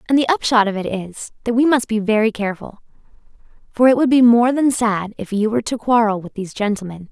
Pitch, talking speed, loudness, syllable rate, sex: 225 Hz, 230 wpm, -17 LUFS, 6.1 syllables/s, female